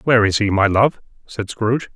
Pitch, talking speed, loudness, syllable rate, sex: 110 Hz, 215 wpm, -18 LUFS, 5.7 syllables/s, male